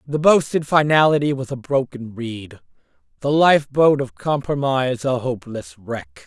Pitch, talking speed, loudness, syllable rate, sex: 135 Hz, 145 wpm, -19 LUFS, 4.5 syllables/s, male